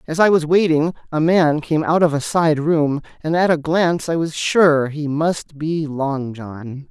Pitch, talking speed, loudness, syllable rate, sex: 155 Hz, 210 wpm, -18 LUFS, 4.1 syllables/s, male